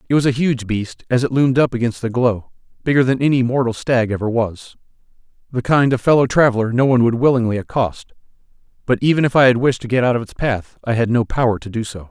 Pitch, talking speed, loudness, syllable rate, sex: 125 Hz, 235 wpm, -17 LUFS, 6.3 syllables/s, male